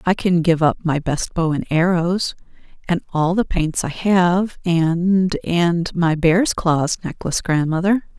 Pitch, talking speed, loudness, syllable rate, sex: 170 Hz, 155 wpm, -19 LUFS, 3.8 syllables/s, female